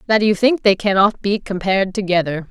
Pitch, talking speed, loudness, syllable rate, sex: 200 Hz, 190 wpm, -17 LUFS, 5.6 syllables/s, female